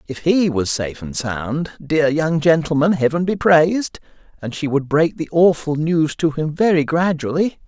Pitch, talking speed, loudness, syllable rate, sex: 155 Hz, 180 wpm, -18 LUFS, 4.6 syllables/s, male